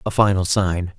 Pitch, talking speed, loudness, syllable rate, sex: 95 Hz, 185 wpm, -19 LUFS, 4.7 syllables/s, male